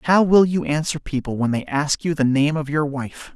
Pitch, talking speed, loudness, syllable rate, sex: 150 Hz, 250 wpm, -20 LUFS, 5.0 syllables/s, male